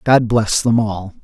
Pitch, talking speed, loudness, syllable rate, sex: 110 Hz, 195 wpm, -16 LUFS, 3.7 syllables/s, male